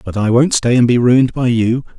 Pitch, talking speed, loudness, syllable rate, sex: 120 Hz, 270 wpm, -13 LUFS, 5.6 syllables/s, male